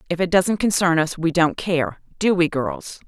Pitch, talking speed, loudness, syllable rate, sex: 175 Hz, 215 wpm, -20 LUFS, 4.5 syllables/s, female